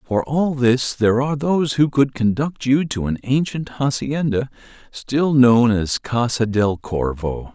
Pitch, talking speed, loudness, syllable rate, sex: 125 Hz, 150 wpm, -19 LUFS, 4.2 syllables/s, male